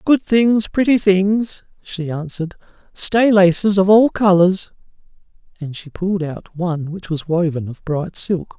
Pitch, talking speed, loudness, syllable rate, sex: 185 Hz, 155 wpm, -17 LUFS, 4.3 syllables/s, male